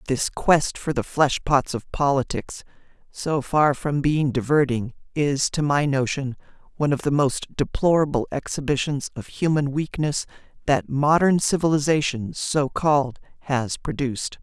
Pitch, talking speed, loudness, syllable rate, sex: 140 Hz, 135 wpm, -22 LUFS, 4.5 syllables/s, female